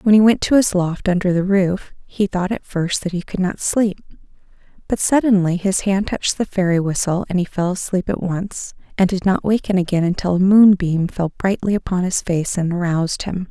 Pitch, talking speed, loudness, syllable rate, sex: 185 Hz, 215 wpm, -18 LUFS, 5.1 syllables/s, female